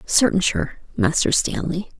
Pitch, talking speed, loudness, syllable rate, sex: 190 Hz, 120 wpm, -20 LUFS, 4.1 syllables/s, female